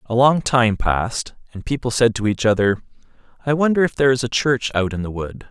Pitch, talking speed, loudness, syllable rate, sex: 120 Hz, 220 wpm, -19 LUFS, 5.8 syllables/s, male